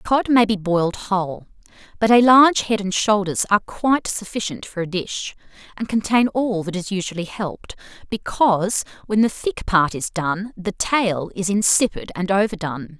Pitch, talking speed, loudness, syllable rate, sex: 200 Hz, 170 wpm, -20 LUFS, 5.0 syllables/s, female